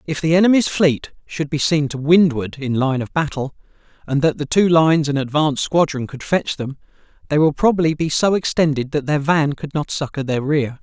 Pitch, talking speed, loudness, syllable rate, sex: 150 Hz, 210 wpm, -18 LUFS, 5.4 syllables/s, male